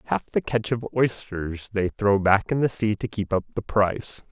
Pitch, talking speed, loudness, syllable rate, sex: 105 Hz, 220 wpm, -24 LUFS, 4.8 syllables/s, male